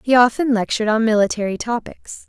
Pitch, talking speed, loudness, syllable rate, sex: 225 Hz, 160 wpm, -18 LUFS, 6.0 syllables/s, female